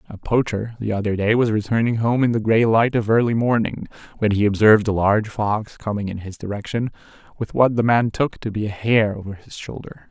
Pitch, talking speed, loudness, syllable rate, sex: 110 Hz, 220 wpm, -20 LUFS, 5.6 syllables/s, male